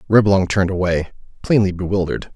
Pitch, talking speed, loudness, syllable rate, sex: 95 Hz, 125 wpm, -18 LUFS, 6.6 syllables/s, male